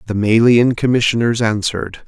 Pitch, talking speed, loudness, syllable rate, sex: 115 Hz, 115 wpm, -15 LUFS, 5.4 syllables/s, male